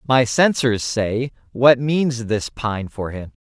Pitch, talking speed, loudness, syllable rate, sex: 120 Hz, 160 wpm, -19 LUFS, 3.4 syllables/s, male